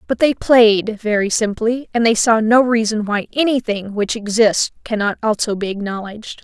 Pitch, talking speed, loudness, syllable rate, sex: 220 Hz, 170 wpm, -16 LUFS, 4.8 syllables/s, female